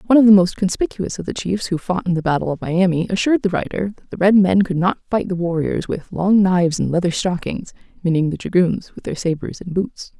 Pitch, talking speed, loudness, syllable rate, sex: 185 Hz, 240 wpm, -19 LUFS, 5.9 syllables/s, female